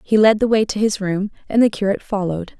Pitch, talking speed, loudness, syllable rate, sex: 205 Hz, 255 wpm, -18 LUFS, 6.5 syllables/s, female